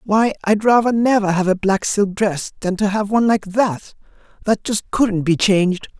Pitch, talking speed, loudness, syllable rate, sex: 205 Hz, 190 wpm, -17 LUFS, 4.7 syllables/s, male